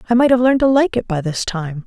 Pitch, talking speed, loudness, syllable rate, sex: 220 Hz, 320 wpm, -16 LUFS, 6.6 syllables/s, female